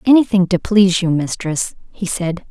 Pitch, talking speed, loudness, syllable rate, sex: 185 Hz, 165 wpm, -16 LUFS, 4.9 syllables/s, female